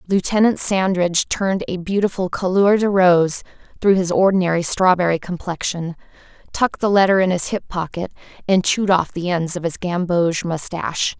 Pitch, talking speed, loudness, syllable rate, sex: 185 Hz, 155 wpm, -18 LUFS, 5.5 syllables/s, female